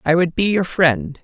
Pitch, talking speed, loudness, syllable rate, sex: 160 Hz, 245 wpm, -17 LUFS, 4.5 syllables/s, male